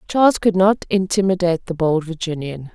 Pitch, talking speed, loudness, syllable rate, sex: 180 Hz, 155 wpm, -18 LUFS, 5.5 syllables/s, female